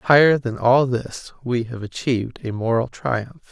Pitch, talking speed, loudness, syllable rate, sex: 125 Hz, 170 wpm, -21 LUFS, 4.2 syllables/s, male